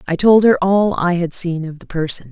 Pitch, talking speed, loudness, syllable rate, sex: 175 Hz, 260 wpm, -16 LUFS, 5.1 syllables/s, female